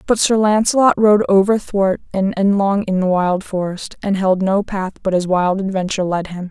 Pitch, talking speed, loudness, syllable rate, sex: 195 Hz, 195 wpm, -16 LUFS, 5.0 syllables/s, female